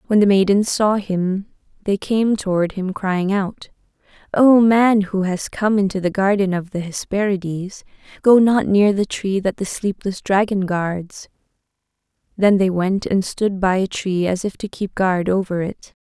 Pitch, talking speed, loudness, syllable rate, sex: 195 Hz, 175 wpm, -18 LUFS, 4.4 syllables/s, female